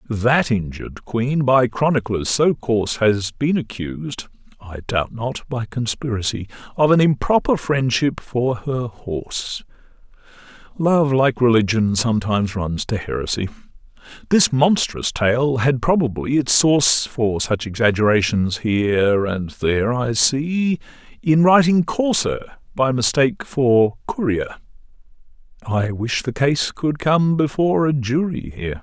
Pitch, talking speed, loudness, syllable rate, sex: 125 Hz, 125 wpm, -19 LUFS, 3.0 syllables/s, male